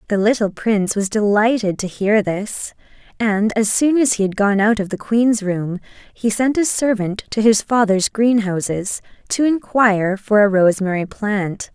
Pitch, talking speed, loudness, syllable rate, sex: 210 Hz, 175 wpm, -17 LUFS, 4.5 syllables/s, female